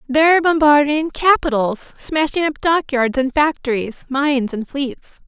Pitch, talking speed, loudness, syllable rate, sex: 285 Hz, 125 wpm, -17 LUFS, 4.4 syllables/s, female